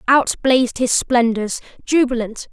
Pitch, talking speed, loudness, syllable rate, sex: 245 Hz, 95 wpm, -17 LUFS, 4.5 syllables/s, female